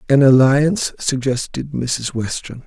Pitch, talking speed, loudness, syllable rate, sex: 130 Hz, 115 wpm, -17 LUFS, 4.1 syllables/s, male